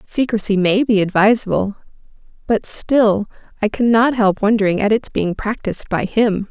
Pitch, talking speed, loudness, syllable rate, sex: 215 Hz, 150 wpm, -17 LUFS, 4.9 syllables/s, female